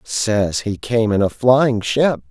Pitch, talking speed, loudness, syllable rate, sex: 110 Hz, 180 wpm, -17 LUFS, 3.3 syllables/s, male